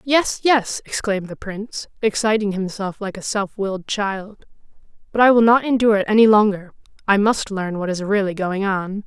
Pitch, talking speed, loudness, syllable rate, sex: 205 Hz, 185 wpm, -19 LUFS, 5.2 syllables/s, female